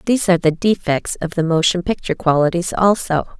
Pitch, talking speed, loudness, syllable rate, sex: 175 Hz, 175 wpm, -17 LUFS, 6.1 syllables/s, female